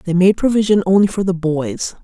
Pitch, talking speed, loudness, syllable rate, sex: 185 Hz, 205 wpm, -15 LUFS, 5.2 syllables/s, female